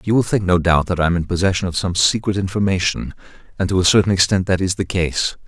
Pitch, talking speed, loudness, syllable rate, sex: 95 Hz, 250 wpm, -18 LUFS, 6.4 syllables/s, male